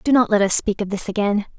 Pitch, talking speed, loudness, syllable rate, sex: 210 Hz, 305 wpm, -19 LUFS, 6.5 syllables/s, female